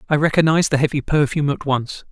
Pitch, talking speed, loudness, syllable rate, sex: 145 Hz, 200 wpm, -18 LUFS, 6.8 syllables/s, male